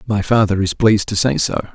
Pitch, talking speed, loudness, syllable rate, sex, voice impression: 105 Hz, 240 wpm, -16 LUFS, 5.7 syllables/s, male, very masculine, very adult-like, very middle-aged, very thick, tensed, very powerful, slightly bright, slightly soft, clear, fluent, cool, very intellectual, refreshing, very sincere, very calm, mature, very friendly, very reassuring, unique, very elegant, wild, very sweet, slightly lively, very kind, slightly modest